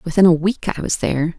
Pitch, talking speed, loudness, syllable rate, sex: 175 Hz, 260 wpm, -18 LUFS, 6.6 syllables/s, female